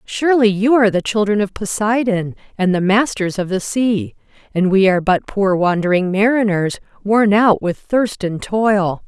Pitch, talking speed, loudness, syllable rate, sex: 200 Hz, 170 wpm, -16 LUFS, 4.7 syllables/s, female